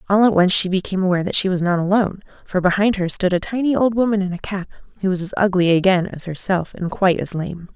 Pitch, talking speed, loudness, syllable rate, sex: 190 Hz, 255 wpm, -19 LUFS, 6.7 syllables/s, female